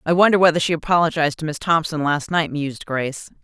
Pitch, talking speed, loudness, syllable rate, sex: 160 Hz, 210 wpm, -19 LUFS, 6.5 syllables/s, female